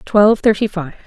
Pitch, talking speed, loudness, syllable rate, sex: 200 Hz, 170 wpm, -14 LUFS, 5.4 syllables/s, female